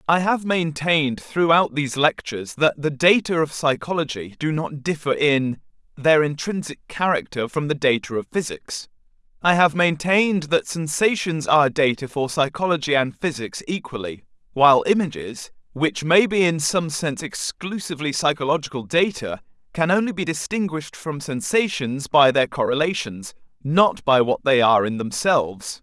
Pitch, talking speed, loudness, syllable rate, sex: 150 Hz, 145 wpm, -21 LUFS, 4.9 syllables/s, male